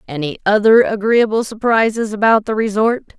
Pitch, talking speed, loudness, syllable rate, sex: 215 Hz, 130 wpm, -15 LUFS, 5.1 syllables/s, female